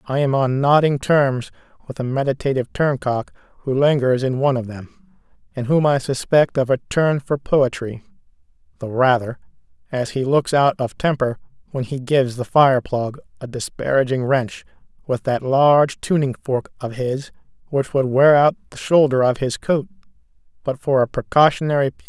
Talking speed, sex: 175 wpm, male